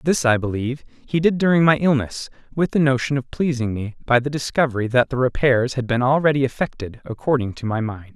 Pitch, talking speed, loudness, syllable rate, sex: 130 Hz, 205 wpm, -20 LUFS, 5.9 syllables/s, male